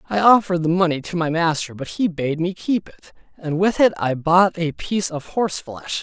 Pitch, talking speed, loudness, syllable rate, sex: 170 Hz, 230 wpm, -20 LUFS, 5.4 syllables/s, male